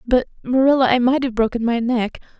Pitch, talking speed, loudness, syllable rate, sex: 245 Hz, 200 wpm, -18 LUFS, 5.8 syllables/s, female